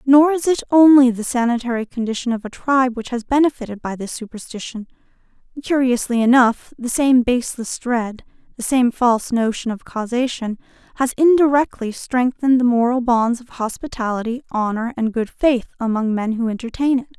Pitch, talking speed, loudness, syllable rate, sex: 245 Hz, 155 wpm, -18 LUFS, 5.4 syllables/s, female